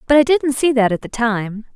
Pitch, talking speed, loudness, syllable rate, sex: 250 Hz, 275 wpm, -17 LUFS, 5.3 syllables/s, female